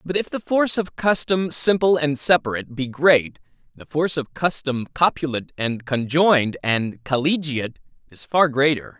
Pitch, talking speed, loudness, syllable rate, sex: 150 Hz, 155 wpm, -20 LUFS, 5.0 syllables/s, male